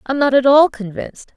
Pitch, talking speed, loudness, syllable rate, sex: 260 Hz, 220 wpm, -13 LUFS, 5.7 syllables/s, female